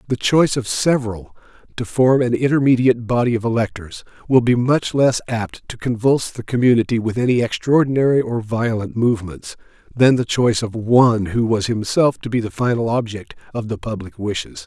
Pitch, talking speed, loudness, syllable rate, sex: 115 Hz, 175 wpm, -18 LUFS, 5.5 syllables/s, male